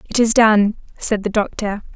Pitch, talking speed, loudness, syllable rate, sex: 210 Hz, 185 wpm, -17 LUFS, 4.8 syllables/s, female